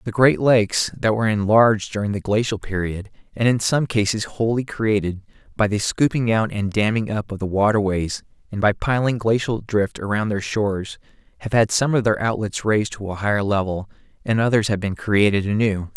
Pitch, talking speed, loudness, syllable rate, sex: 105 Hz, 185 wpm, -20 LUFS, 5.4 syllables/s, male